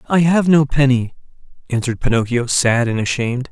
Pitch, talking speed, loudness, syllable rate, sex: 130 Hz, 155 wpm, -16 LUFS, 5.8 syllables/s, male